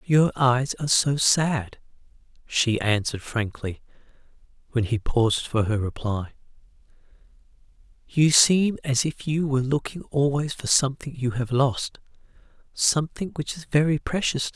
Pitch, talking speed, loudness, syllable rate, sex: 135 Hz, 140 wpm, -23 LUFS, 4.8 syllables/s, male